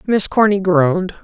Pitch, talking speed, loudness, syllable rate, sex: 200 Hz, 145 wpm, -15 LUFS, 4.8 syllables/s, female